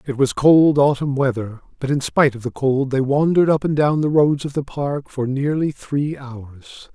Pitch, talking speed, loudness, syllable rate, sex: 140 Hz, 215 wpm, -18 LUFS, 4.7 syllables/s, male